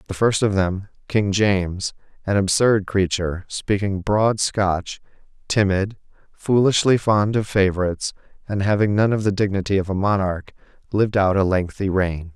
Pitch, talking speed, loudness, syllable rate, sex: 100 Hz, 150 wpm, -20 LUFS, 4.7 syllables/s, male